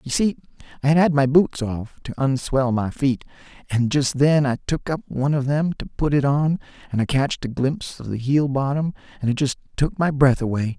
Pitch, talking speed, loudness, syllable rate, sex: 140 Hz, 230 wpm, -21 LUFS, 5.3 syllables/s, male